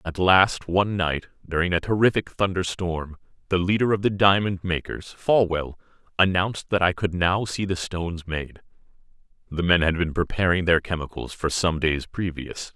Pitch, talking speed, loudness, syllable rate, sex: 90 Hz, 160 wpm, -23 LUFS, 4.9 syllables/s, male